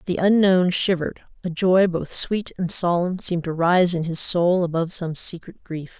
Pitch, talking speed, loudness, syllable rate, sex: 175 Hz, 190 wpm, -20 LUFS, 4.9 syllables/s, female